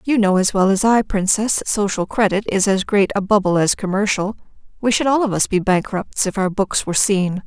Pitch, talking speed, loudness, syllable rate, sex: 200 Hz, 235 wpm, -18 LUFS, 5.4 syllables/s, female